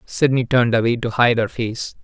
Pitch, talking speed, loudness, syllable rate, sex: 120 Hz, 205 wpm, -18 LUFS, 5.3 syllables/s, male